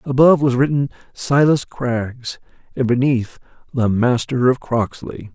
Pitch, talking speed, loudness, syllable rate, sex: 125 Hz, 125 wpm, -18 LUFS, 4.2 syllables/s, male